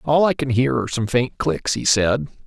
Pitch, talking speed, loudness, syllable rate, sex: 120 Hz, 245 wpm, -20 LUFS, 5.0 syllables/s, male